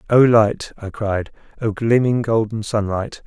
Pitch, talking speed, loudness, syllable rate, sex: 110 Hz, 145 wpm, -19 LUFS, 4.1 syllables/s, male